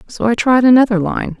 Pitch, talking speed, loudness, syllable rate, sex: 230 Hz, 215 wpm, -13 LUFS, 5.7 syllables/s, female